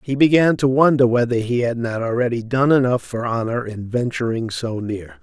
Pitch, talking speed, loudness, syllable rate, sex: 125 Hz, 195 wpm, -19 LUFS, 5.1 syllables/s, male